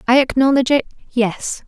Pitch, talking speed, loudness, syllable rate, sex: 255 Hz, 110 wpm, -17 LUFS, 5.4 syllables/s, female